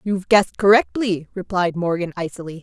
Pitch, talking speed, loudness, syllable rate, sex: 185 Hz, 160 wpm, -19 LUFS, 5.8 syllables/s, female